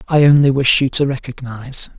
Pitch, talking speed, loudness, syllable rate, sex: 135 Hz, 180 wpm, -14 LUFS, 5.7 syllables/s, male